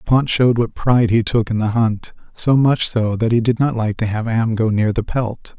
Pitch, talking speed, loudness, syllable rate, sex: 115 Hz, 260 wpm, -17 LUFS, 4.9 syllables/s, male